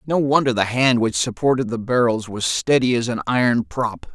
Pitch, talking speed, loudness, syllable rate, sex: 120 Hz, 205 wpm, -19 LUFS, 5.0 syllables/s, male